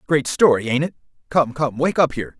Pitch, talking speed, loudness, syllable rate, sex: 140 Hz, 225 wpm, -19 LUFS, 5.8 syllables/s, male